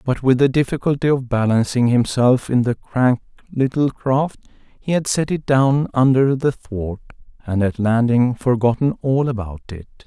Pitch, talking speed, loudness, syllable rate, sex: 125 Hz, 160 wpm, -18 LUFS, 4.5 syllables/s, male